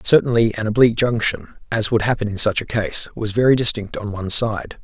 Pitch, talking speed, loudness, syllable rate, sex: 110 Hz, 210 wpm, -18 LUFS, 5.7 syllables/s, male